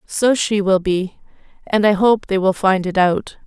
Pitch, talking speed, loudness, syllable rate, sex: 195 Hz, 210 wpm, -17 LUFS, 4.2 syllables/s, female